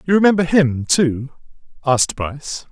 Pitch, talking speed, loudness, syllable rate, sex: 150 Hz, 135 wpm, -17 LUFS, 4.9 syllables/s, male